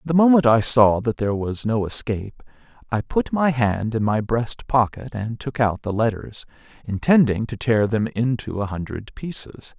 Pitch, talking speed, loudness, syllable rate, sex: 115 Hz, 185 wpm, -21 LUFS, 4.7 syllables/s, male